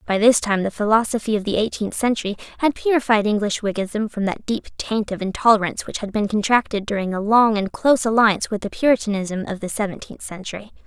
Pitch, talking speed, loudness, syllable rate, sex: 210 Hz, 200 wpm, -20 LUFS, 6.1 syllables/s, female